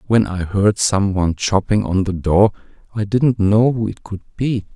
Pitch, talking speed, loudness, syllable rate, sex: 105 Hz, 200 wpm, -17 LUFS, 4.6 syllables/s, male